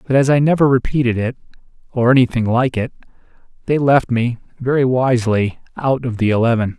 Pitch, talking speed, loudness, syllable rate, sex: 125 Hz, 150 wpm, -16 LUFS, 5.8 syllables/s, male